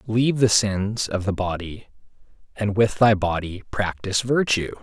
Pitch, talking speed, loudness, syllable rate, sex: 100 Hz, 150 wpm, -22 LUFS, 4.6 syllables/s, male